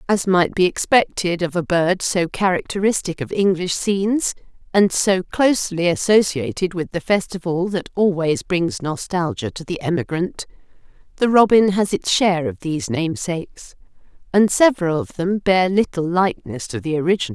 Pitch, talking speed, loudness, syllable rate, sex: 175 Hz, 150 wpm, -19 LUFS, 5.0 syllables/s, female